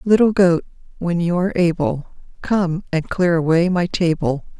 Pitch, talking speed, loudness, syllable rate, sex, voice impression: 175 Hz, 155 wpm, -18 LUFS, 4.6 syllables/s, female, very feminine, very adult-like, middle-aged, slightly thin, relaxed, weak, slightly dark, slightly muffled, fluent, slightly cool, very intellectual, sincere, very calm, very friendly, very reassuring, slightly unique, very elegant, slightly sweet, very kind, modest